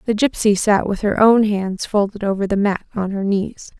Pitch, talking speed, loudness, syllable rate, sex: 205 Hz, 220 wpm, -18 LUFS, 4.8 syllables/s, female